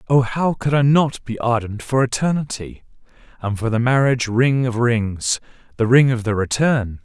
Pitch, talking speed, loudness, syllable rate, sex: 120 Hz, 170 wpm, -19 LUFS, 4.7 syllables/s, male